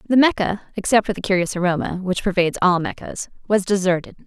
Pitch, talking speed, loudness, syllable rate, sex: 195 Hz, 185 wpm, -20 LUFS, 6.3 syllables/s, female